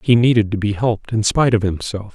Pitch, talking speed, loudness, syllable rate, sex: 110 Hz, 250 wpm, -17 LUFS, 6.3 syllables/s, male